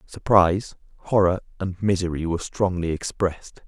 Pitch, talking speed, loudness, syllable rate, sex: 90 Hz, 115 wpm, -23 LUFS, 5.4 syllables/s, male